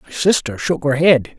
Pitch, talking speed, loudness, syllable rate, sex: 150 Hz, 215 wpm, -16 LUFS, 4.7 syllables/s, male